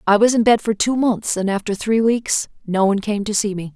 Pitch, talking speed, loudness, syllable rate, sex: 210 Hz, 270 wpm, -18 LUFS, 5.5 syllables/s, female